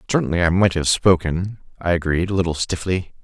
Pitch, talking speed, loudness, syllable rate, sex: 90 Hz, 185 wpm, -20 LUFS, 5.8 syllables/s, male